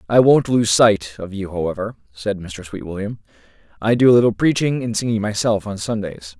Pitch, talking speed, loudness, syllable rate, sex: 105 Hz, 190 wpm, -18 LUFS, 5.4 syllables/s, male